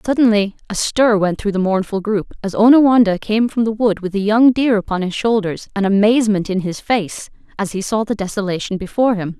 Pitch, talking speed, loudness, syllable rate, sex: 210 Hz, 210 wpm, -16 LUFS, 5.6 syllables/s, female